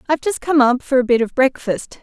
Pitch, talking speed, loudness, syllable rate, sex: 260 Hz, 265 wpm, -17 LUFS, 6.0 syllables/s, female